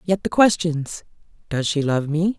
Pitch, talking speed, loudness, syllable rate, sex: 165 Hz, 150 wpm, -20 LUFS, 4.3 syllables/s, female